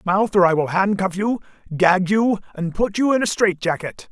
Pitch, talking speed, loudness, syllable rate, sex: 195 Hz, 205 wpm, -19 LUFS, 4.9 syllables/s, female